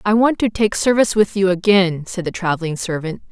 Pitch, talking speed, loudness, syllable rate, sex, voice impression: 195 Hz, 215 wpm, -17 LUFS, 5.7 syllables/s, female, feminine, adult-like, thick, tensed, slightly powerful, hard, clear, intellectual, calm, friendly, reassuring, elegant, lively, slightly strict